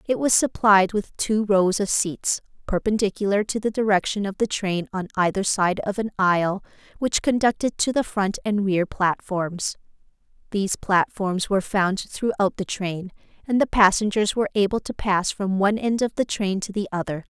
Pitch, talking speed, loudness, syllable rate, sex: 200 Hz, 180 wpm, -22 LUFS, 5.0 syllables/s, female